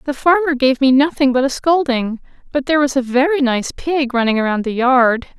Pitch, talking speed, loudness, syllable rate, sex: 270 Hz, 210 wpm, -16 LUFS, 5.4 syllables/s, female